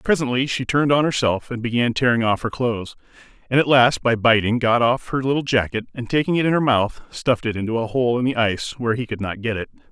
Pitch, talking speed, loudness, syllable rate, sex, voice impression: 120 Hz, 250 wpm, -20 LUFS, 6.3 syllables/s, male, masculine, adult-like, slightly thick, fluent, refreshing, slightly sincere, slightly lively